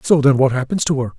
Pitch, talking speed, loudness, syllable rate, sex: 135 Hz, 305 wpm, -16 LUFS, 6.7 syllables/s, male